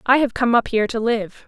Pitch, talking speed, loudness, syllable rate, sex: 230 Hz, 285 wpm, -19 LUFS, 5.9 syllables/s, female